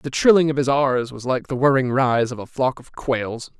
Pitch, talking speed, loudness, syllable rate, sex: 130 Hz, 250 wpm, -20 LUFS, 4.9 syllables/s, male